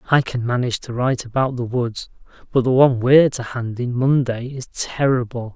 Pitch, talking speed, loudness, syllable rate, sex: 125 Hz, 195 wpm, -19 LUFS, 5.5 syllables/s, male